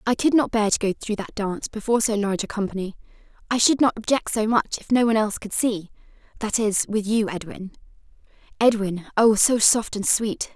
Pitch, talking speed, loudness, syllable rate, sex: 215 Hz, 200 wpm, -22 LUFS, 5.9 syllables/s, female